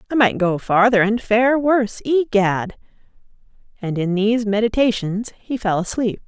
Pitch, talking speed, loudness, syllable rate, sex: 220 Hz, 145 wpm, -18 LUFS, 4.9 syllables/s, female